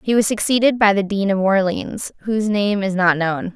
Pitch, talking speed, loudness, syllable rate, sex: 200 Hz, 220 wpm, -18 LUFS, 5.1 syllables/s, female